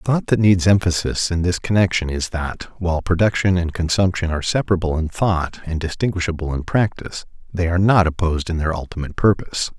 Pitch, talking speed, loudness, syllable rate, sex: 90 Hz, 185 wpm, -19 LUFS, 6.2 syllables/s, male